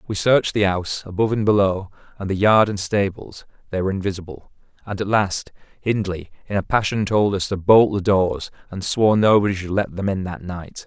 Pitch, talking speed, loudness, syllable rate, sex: 100 Hz, 205 wpm, -20 LUFS, 5.6 syllables/s, male